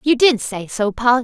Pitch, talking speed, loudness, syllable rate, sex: 240 Hz, 245 wpm, -17 LUFS, 5.1 syllables/s, female